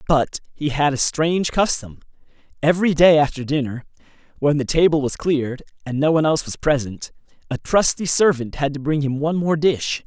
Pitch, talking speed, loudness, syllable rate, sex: 145 Hz, 185 wpm, -19 LUFS, 5.6 syllables/s, male